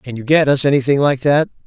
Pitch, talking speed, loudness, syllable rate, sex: 140 Hz, 250 wpm, -15 LUFS, 6.1 syllables/s, male